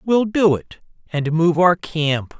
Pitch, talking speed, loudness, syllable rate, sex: 170 Hz, 175 wpm, -18 LUFS, 3.5 syllables/s, male